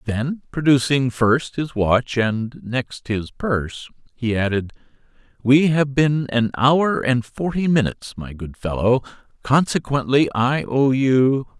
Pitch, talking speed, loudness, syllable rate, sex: 125 Hz, 135 wpm, -20 LUFS, 3.8 syllables/s, male